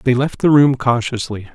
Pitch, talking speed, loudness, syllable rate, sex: 125 Hz, 195 wpm, -15 LUFS, 4.8 syllables/s, male